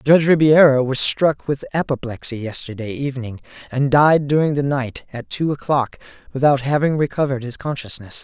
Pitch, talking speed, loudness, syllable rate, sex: 135 Hz, 155 wpm, -18 LUFS, 5.4 syllables/s, male